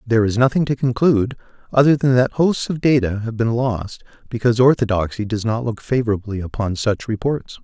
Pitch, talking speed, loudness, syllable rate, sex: 120 Hz, 180 wpm, -19 LUFS, 5.7 syllables/s, male